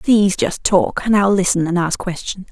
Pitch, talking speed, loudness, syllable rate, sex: 190 Hz, 190 wpm, -17 LUFS, 4.9 syllables/s, female